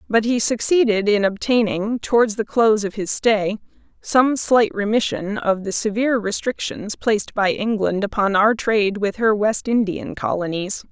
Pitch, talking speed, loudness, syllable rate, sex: 215 Hz, 160 wpm, -19 LUFS, 4.7 syllables/s, female